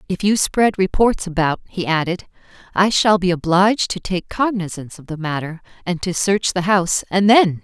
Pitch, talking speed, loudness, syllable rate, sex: 185 Hz, 190 wpm, -18 LUFS, 5.1 syllables/s, female